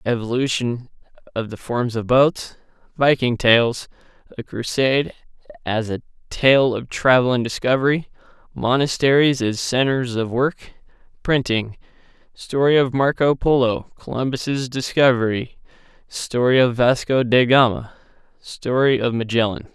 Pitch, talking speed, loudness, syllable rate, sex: 125 Hz, 110 wpm, -19 LUFS, 4.4 syllables/s, male